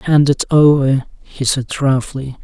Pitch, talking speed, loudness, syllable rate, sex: 140 Hz, 150 wpm, -15 LUFS, 3.9 syllables/s, male